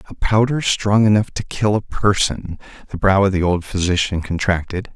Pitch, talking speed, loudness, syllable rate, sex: 95 Hz, 180 wpm, -18 LUFS, 5.0 syllables/s, male